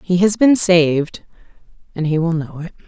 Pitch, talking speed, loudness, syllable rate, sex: 175 Hz, 190 wpm, -16 LUFS, 5.2 syllables/s, female